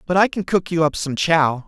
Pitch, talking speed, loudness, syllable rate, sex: 165 Hz, 285 wpm, -19 LUFS, 5.2 syllables/s, male